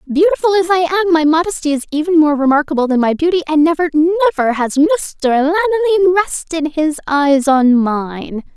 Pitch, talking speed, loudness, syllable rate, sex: 315 Hz, 170 wpm, -14 LUFS, 6.1 syllables/s, female